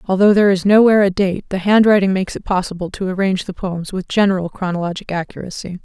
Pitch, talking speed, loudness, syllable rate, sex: 190 Hz, 195 wpm, -16 LUFS, 6.8 syllables/s, female